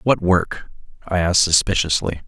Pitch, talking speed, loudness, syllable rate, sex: 90 Hz, 130 wpm, -18 LUFS, 5.2 syllables/s, male